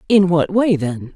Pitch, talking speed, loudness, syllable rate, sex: 175 Hz, 210 wpm, -16 LUFS, 4.1 syllables/s, female